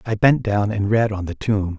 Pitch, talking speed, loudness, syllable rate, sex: 105 Hz, 270 wpm, -20 LUFS, 4.8 syllables/s, male